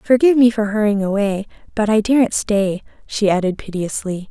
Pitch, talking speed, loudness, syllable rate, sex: 210 Hz, 165 wpm, -17 LUFS, 5.4 syllables/s, female